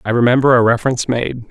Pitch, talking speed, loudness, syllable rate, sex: 120 Hz, 200 wpm, -14 LUFS, 7.2 syllables/s, male